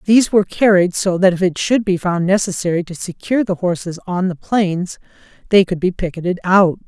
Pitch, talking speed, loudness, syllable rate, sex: 185 Hz, 200 wpm, -16 LUFS, 5.6 syllables/s, female